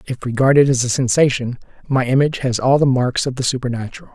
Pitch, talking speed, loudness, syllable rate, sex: 130 Hz, 205 wpm, -17 LUFS, 6.6 syllables/s, male